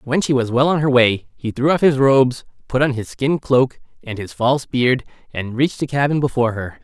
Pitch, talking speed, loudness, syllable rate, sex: 130 Hz, 235 wpm, -18 LUFS, 5.6 syllables/s, male